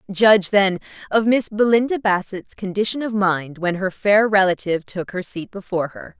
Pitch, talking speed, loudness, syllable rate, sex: 200 Hz, 175 wpm, -19 LUFS, 5.1 syllables/s, female